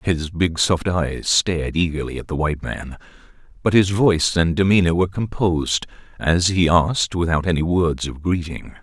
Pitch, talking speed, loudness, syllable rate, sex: 85 Hz, 170 wpm, -19 LUFS, 5.1 syllables/s, male